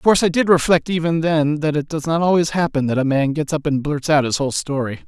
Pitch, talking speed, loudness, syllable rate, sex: 155 Hz, 285 wpm, -18 LUFS, 6.2 syllables/s, male